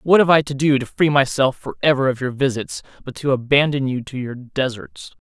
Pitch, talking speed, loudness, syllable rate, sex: 135 Hz, 230 wpm, -19 LUFS, 5.4 syllables/s, male